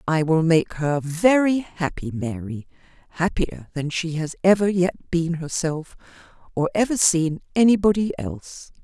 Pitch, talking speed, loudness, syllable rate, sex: 170 Hz, 135 wpm, -22 LUFS, 4.3 syllables/s, female